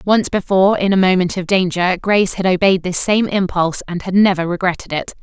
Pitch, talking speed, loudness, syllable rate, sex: 185 Hz, 205 wpm, -16 LUFS, 5.9 syllables/s, female